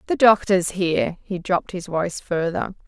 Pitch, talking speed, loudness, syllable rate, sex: 185 Hz, 165 wpm, -21 LUFS, 5.3 syllables/s, female